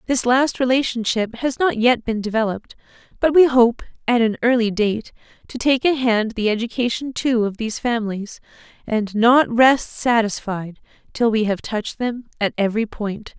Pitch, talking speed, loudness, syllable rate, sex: 230 Hz, 165 wpm, -19 LUFS, 4.9 syllables/s, female